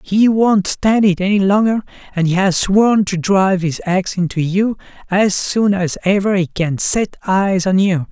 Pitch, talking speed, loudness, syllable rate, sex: 190 Hz, 185 wpm, -15 LUFS, 4.3 syllables/s, male